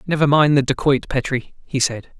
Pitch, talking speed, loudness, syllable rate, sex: 140 Hz, 190 wpm, -18 LUFS, 5.3 syllables/s, male